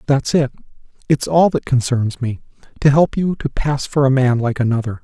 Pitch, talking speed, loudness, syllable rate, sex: 135 Hz, 190 wpm, -17 LUFS, 5.1 syllables/s, male